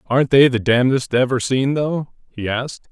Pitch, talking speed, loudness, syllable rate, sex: 130 Hz, 185 wpm, -18 LUFS, 5.4 syllables/s, male